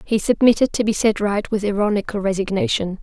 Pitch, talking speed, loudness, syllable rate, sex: 205 Hz, 180 wpm, -19 LUFS, 5.8 syllables/s, female